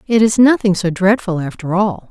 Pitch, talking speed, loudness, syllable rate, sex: 195 Hz, 200 wpm, -15 LUFS, 5.1 syllables/s, female